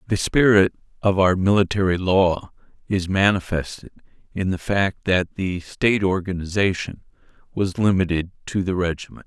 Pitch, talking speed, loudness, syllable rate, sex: 95 Hz, 130 wpm, -21 LUFS, 4.9 syllables/s, male